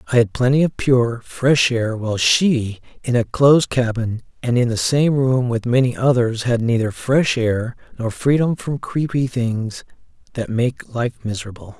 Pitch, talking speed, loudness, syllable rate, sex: 120 Hz, 175 wpm, -18 LUFS, 4.5 syllables/s, male